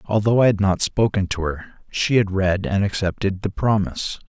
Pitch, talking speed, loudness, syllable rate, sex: 100 Hz, 195 wpm, -20 LUFS, 5.2 syllables/s, male